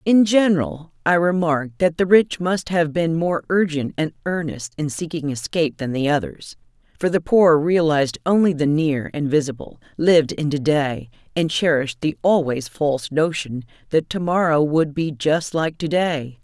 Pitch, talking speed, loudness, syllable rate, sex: 155 Hz, 175 wpm, -20 LUFS, 4.8 syllables/s, female